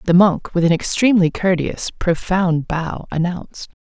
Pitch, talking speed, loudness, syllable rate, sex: 175 Hz, 140 wpm, -18 LUFS, 4.5 syllables/s, female